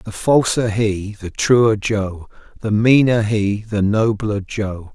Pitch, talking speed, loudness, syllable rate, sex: 105 Hz, 145 wpm, -17 LUFS, 3.4 syllables/s, male